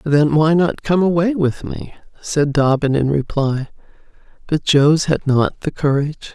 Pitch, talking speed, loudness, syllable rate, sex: 150 Hz, 160 wpm, -17 LUFS, 4.4 syllables/s, female